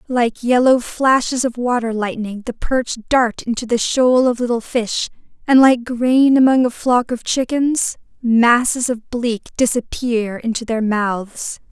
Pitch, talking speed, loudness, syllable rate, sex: 240 Hz, 155 wpm, -17 LUFS, 4.0 syllables/s, female